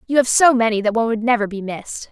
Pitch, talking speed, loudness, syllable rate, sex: 230 Hz, 285 wpm, -17 LUFS, 7.2 syllables/s, female